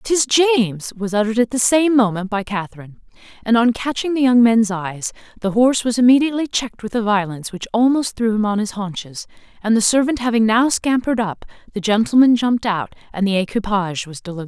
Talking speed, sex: 210 wpm, female